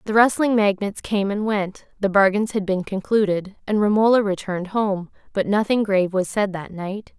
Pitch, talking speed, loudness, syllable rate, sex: 200 Hz, 185 wpm, -21 LUFS, 5.2 syllables/s, female